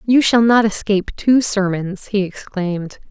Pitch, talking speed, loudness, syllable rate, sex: 205 Hz, 155 wpm, -17 LUFS, 4.5 syllables/s, female